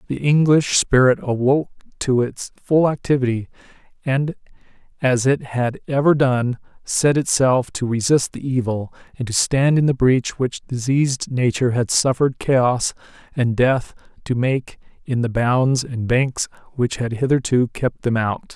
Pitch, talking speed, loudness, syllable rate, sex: 130 Hz, 150 wpm, -19 LUFS, 4.4 syllables/s, male